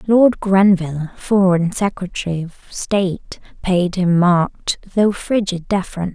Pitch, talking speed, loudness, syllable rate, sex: 185 Hz, 100 wpm, -17 LUFS, 4.4 syllables/s, female